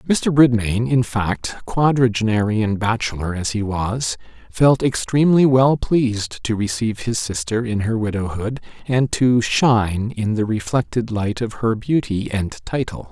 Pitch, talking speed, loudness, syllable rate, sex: 115 Hz, 145 wpm, -19 LUFS, 4.3 syllables/s, male